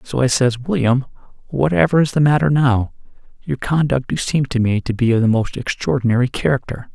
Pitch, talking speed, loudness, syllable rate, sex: 130 Hz, 190 wpm, -17 LUFS, 5.6 syllables/s, male